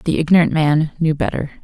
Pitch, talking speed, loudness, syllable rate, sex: 155 Hz, 185 wpm, -16 LUFS, 5.9 syllables/s, female